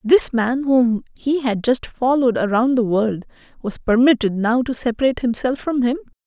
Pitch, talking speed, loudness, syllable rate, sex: 245 Hz, 170 wpm, -19 LUFS, 5.0 syllables/s, female